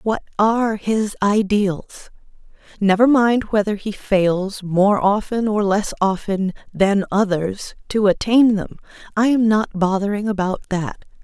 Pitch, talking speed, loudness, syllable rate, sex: 205 Hz, 135 wpm, -18 LUFS, 3.9 syllables/s, female